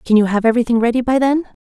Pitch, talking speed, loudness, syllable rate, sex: 240 Hz, 260 wpm, -15 LUFS, 8.1 syllables/s, female